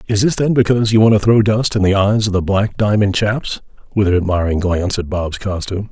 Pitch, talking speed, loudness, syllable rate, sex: 100 Hz, 245 wpm, -15 LUFS, 4.3 syllables/s, male